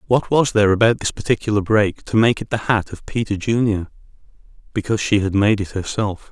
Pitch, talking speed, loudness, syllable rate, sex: 105 Hz, 200 wpm, -19 LUFS, 5.8 syllables/s, male